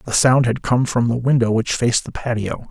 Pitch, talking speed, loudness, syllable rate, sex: 120 Hz, 245 wpm, -18 LUFS, 5.5 syllables/s, male